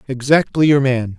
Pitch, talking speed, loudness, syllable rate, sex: 130 Hz, 150 wpm, -15 LUFS, 4.9 syllables/s, male